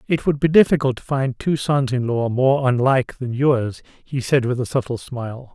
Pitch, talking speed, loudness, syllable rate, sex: 130 Hz, 215 wpm, -20 LUFS, 4.9 syllables/s, male